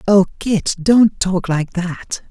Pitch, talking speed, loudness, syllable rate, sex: 190 Hz, 155 wpm, -16 LUFS, 3.1 syllables/s, male